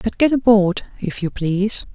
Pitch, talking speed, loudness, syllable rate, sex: 205 Hz, 185 wpm, -18 LUFS, 4.7 syllables/s, female